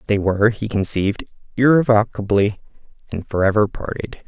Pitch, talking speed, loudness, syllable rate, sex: 105 Hz, 125 wpm, -18 LUFS, 5.5 syllables/s, male